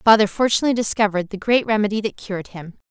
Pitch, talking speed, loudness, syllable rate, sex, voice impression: 210 Hz, 185 wpm, -19 LUFS, 7.2 syllables/s, female, very feminine, very middle-aged, very thin, very tensed, very powerful, very bright, very hard, very clear, very fluent, raspy, slightly cool, slightly intellectual, refreshing, slightly sincere, slightly calm, slightly friendly, slightly reassuring, very unique, slightly elegant, wild, slightly sweet, very lively, very strict, very intense, very sharp, very light